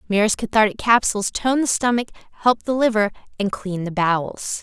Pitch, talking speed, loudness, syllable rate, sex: 215 Hz, 170 wpm, -20 LUFS, 5.5 syllables/s, female